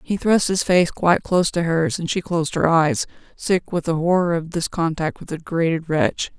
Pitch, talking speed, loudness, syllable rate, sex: 165 Hz, 225 wpm, -20 LUFS, 5.2 syllables/s, female